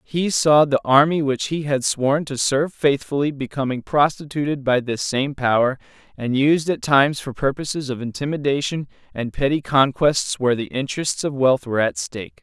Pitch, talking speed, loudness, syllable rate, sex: 140 Hz, 175 wpm, -20 LUFS, 5.2 syllables/s, male